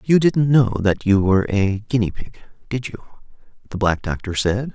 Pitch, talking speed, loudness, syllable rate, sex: 110 Hz, 190 wpm, -19 LUFS, 5.0 syllables/s, male